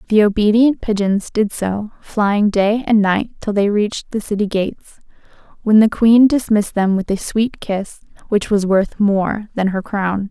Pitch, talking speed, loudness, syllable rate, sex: 205 Hz, 180 wpm, -16 LUFS, 4.4 syllables/s, female